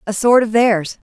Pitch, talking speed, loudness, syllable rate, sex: 220 Hz, 215 wpm, -14 LUFS, 4.6 syllables/s, female